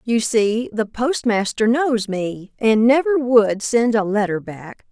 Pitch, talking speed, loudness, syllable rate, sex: 225 Hz, 160 wpm, -18 LUFS, 3.6 syllables/s, female